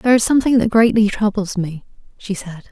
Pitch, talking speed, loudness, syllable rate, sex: 210 Hz, 200 wpm, -17 LUFS, 6.1 syllables/s, female